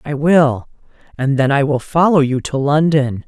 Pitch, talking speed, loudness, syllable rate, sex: 145 Hz, 165 wpm, -15 LUFS, 4.5 syllables/s, female